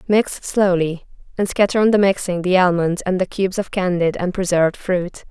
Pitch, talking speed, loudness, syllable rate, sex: 185 Hz, 190 wpm, -18 LUFS, 5.2 syllables/s, female